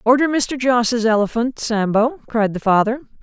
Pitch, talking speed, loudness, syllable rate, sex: 235 Hz, 150 wpm, -18 LUFS, 4.6 syllables/s, female